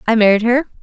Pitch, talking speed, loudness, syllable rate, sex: 230 Hz, 220 wpm, -14 LUFS, 7.1 syllables/s, female